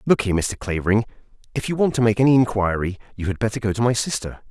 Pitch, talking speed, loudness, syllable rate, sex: 110 Hz, 240 wpm, -21 LUFS, 7.1 syllables/s, male